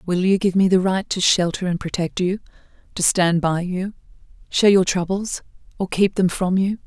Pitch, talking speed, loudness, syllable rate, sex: 185 Hz, 200 wpm, -20 LUFS, 5.2 syllables/s, female